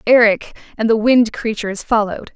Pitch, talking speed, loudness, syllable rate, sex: 220 Hz, 155 wpm, -16 LUFS, 5.3 syllables/s, female